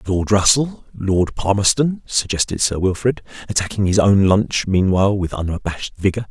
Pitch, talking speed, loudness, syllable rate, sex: 100 Hz, 135 wpm, -18 LUFS, 5.1 syllables/s, male